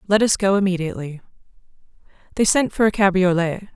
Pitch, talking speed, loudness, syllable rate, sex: 190 Hz, 145 wpm, -19 LUFS, 6.3 syllables/s, female